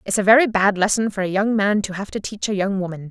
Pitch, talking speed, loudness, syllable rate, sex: 200 Hz, 310 wpm, -19 LUFS, 6.4 syllables/s, female